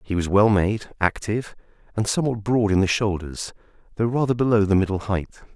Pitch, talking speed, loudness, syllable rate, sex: 105 Hz, 185 wpm, -22 LUFS, 5.9 syllables/s, male